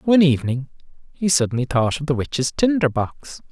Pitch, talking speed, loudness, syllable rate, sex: 145 Hz, 170 wpm, -20 LUFS, 5.4 syllables/s, male